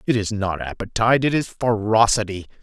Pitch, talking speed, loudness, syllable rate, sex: 110 Hz, 160 wpm, -20 LUFS, 5.5 syllables/s, male